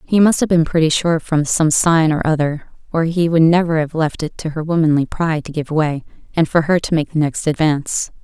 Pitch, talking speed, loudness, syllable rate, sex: 160 Hz, 240 wpm, -16 LUFS, 5.4 syllables/s, female